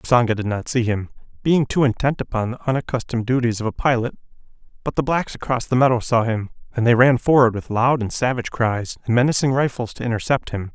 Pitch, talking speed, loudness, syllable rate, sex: 120 Hz, 210 wpm, -20 LUFS, 6.4 syllables/s, male